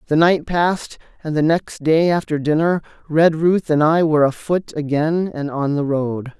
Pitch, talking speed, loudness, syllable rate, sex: 155 Hz, 180 wpm, -18 LUFS, 4.6 syllables/s, male